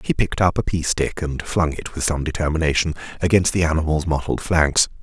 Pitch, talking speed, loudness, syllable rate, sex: 80 Hz, 205 wpm, -20 LUFS, 5.7 syllables/s, male